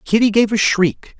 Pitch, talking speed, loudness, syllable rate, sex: 205 Hz, 200 wpm, -15 LUFS, 4.6 syllables/s, male